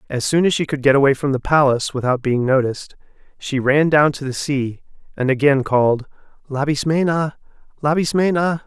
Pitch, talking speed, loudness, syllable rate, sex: 140 Hz, 165 wpm, -18 LUFS, 5.5 syllables/s, male